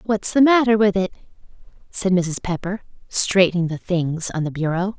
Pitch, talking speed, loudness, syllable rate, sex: 185 Hz, 170 wpm, -20 LUFS, 4.9 syllables/s, female